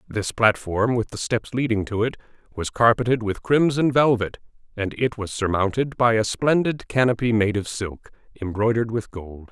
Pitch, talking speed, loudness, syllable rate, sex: 115 Hz, 170 wpm, -22 LUFS, 5.0 syllables/s, male